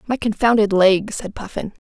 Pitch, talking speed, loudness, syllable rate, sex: 210 Hz, 160 wpm, -18 LUFS, 4.9 syllables/s, female